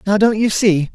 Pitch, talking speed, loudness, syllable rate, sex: 200 Hz, 255 wpm, -15 LUFS, 5.0 syllables/s, male